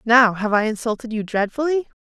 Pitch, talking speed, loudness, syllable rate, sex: 230 Hz, 180 wpm, -20 LUFS, 5.6 syllables/s, female